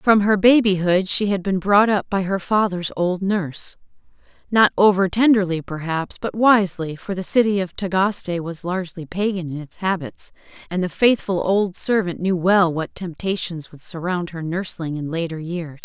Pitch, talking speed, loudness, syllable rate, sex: 185 Hz, 170 wpm, -20 LUFS, 4.8 syllables/s, female